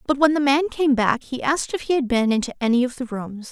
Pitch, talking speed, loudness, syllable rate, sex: 265 Hz, 290 wpm, -21 LUFS, 6.2 syllables/s, female